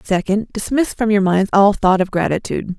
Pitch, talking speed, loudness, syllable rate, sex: 200 Hz, 195 wpm, -16 LUFS, 5.3 syllables/s, female